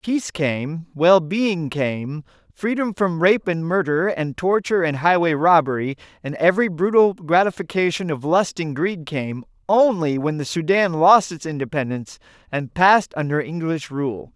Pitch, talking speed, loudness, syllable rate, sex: 165 Hz, 145 wpm, -20 LUFS, 4.6 syllables/s, male